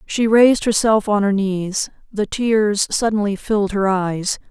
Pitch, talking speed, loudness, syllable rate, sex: 205 Hz, 160 wpm, -18 LUFS, 4.2 syllables/s, female